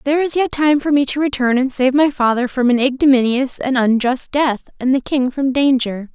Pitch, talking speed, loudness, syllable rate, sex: 265 Hz, 225 wpm, -16 LUFS, 5.2 syllables/s, female